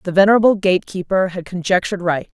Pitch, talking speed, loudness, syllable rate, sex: 185 Hz, 175 wpm, -17 LUFS, 6.3 syllables/s, female